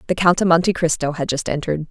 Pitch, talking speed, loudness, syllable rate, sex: 165 Hz, 250 wpm, -18 LUFS, 7.0 syllables/s, female